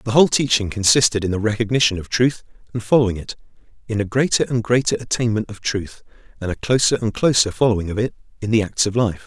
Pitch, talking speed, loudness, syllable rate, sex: 110 Hz, 215 wpm, -19 LUFS, 6.6 syllables/s, male